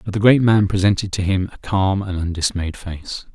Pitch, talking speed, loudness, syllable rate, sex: 95 Hz, 215 wpm, -19 LUFS, 5.1 syllables/s, male